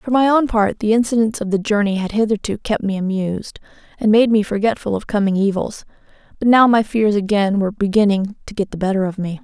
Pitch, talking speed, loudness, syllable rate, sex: 210 Hz, 215 wpm, -17 LUFS, 6.0 syllables/s, female